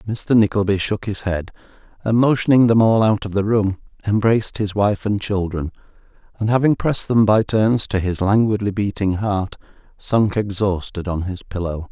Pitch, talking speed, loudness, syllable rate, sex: 105 Hz, 170 wpm, -19 LUFS, 5.0 syllables/s, male